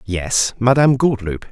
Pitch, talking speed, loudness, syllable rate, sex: 110 Hz, 120 wpm, -16 LUFS, 5.1 syllables/s, male